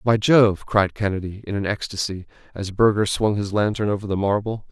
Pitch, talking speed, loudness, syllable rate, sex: 105 Hz, 190 wpm, -21 LUFS, 5.4 syllables/s, male